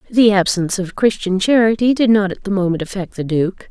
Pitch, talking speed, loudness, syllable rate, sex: 195 Hz, 210 wpm, -16 LUFS, 5.7 syllables/s, female